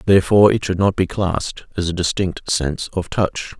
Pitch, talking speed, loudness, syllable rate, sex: 90 Hz, 200 wpm, -19 LUFS, 5.5 syllables/s, male